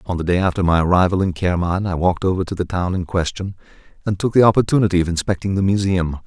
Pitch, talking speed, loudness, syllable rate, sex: 90 Hz, 230 wpm, -18 LUFS, 6.8 syllables/s, male